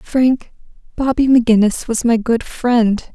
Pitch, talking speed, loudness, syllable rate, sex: 235 Hz, 135 wpm, -15 LUFS, 4.1 syllables/s, female